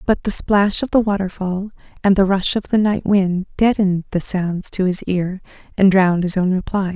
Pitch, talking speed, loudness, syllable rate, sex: 190 Hz, 205 wpm, -18 LUFS, 5.0 syllables/s, female